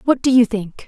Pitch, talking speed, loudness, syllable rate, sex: 235 Hz, 275 wpm, -16 LUFS, 5.2 syllables/s, female